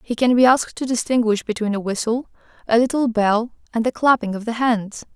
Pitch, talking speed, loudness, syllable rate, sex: 230 Hz, 210 wpm, -19 LUFS, 5.7 syllables/s, female